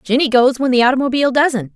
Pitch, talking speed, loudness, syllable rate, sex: 255 Hz, 205 wpm, -14 LUFS, 6.7 syllables/s, female